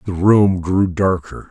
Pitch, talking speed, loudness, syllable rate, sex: 95 Hz, 160 wpm, -16 LUFS, 3.7 syllables/s, male